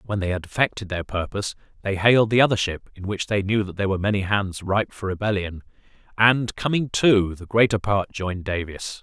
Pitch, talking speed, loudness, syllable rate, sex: 100 Hz, 205 wpm, -22 LUFS, 5.7 syllables/s, male